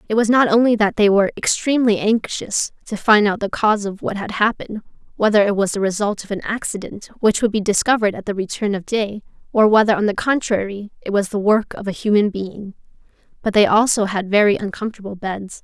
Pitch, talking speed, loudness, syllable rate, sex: 210 Hz, 210 wpm, -18 LUFS, 6.0 syllables/s, female